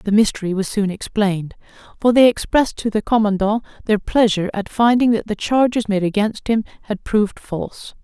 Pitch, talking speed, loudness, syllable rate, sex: 215 Hz, 180 wpm, -18 LUFS, 5.6 syllables/s, female